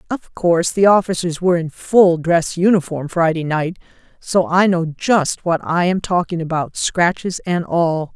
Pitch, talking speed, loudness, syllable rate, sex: 175 Hz, 170 wpm, -17 LUFS, 4.4 syllables/s, female